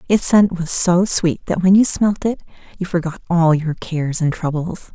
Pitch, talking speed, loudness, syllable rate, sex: 175 Hz, 205 wpm, -17 LUFS, 4.7 syllables/s, female